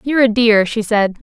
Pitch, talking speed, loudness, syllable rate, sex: 225 Hz, 230 wpm, -14 LUFS, 5.4 syllables/s, female